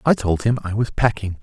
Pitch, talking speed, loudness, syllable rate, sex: 110 Hz, 255 wpm, -20 LUFS, 5.6 syllables/s, male